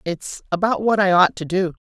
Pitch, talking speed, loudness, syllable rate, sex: 185 Hz, 225 wpm, -19 LUFS, 5.1 syllables/s, female